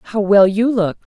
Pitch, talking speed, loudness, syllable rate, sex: 205 Hz, 210 wpm, -15 LUFS, 4.2 syllables/s, female